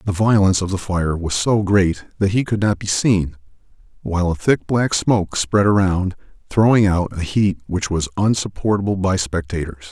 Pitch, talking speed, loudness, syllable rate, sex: 95 Hz, 180 wpm, -18 LUFS, 5.0 syllables/s, male